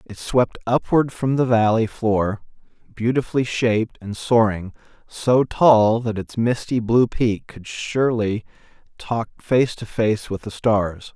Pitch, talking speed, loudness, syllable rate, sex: 115 Hz, 145 wpm, -20 LUFS, 3.9 syllables/s, male